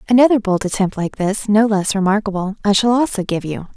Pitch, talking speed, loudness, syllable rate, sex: 205 Hz, 205 wpm, -17 LUFS, 5.8 syllables/s, female